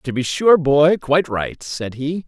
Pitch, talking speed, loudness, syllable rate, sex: 150 Hz, 210 wpm, -17 LUFS, 4.1 syllables/s, male